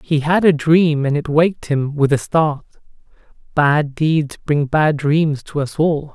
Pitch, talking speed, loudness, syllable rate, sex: 150 Hz, 185 wpm, -17 LUFS, 3.9 syllables/s, male